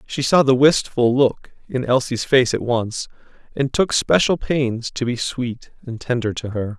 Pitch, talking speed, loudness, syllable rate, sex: 125 Hz, 185 wpm, -19 LUFS, 4.2 syllables/s, male